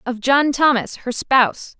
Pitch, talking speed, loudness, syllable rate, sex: 255 Hz, 165 wpm, -17 LUFS, 4.2 syllables/s, female